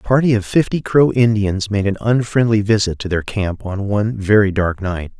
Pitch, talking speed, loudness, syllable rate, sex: 105 Hz, 210 wpm, -17 LUFS, 5.2 syllables/s, male